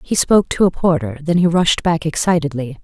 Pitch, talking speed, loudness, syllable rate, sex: 160 Hz, 210 wpm, -16 LUFS, 5.6 syllables/s, female